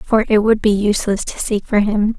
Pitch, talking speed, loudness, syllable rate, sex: 210 Hz, 245 wpm, -16 LUFS, 5.2 syllables/s, female